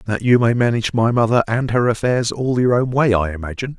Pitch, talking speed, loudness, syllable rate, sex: 115 Hz, 240 wpm, -17 LUFS, 6.0 syllables/s, male